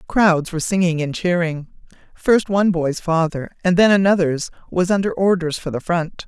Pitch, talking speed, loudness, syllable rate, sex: 175 Hz, 170 wpm, -18 LUFS, 5.0 syllables/s, female